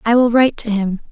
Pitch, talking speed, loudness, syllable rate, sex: 225 Hz, 270 wpm, -15 LUFS, 6.5 syllables/s, female